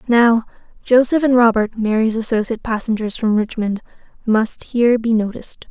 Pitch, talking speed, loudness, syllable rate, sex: 225 Hz, 135 wpm, -17 LUFS, 3.5 syllables/s, female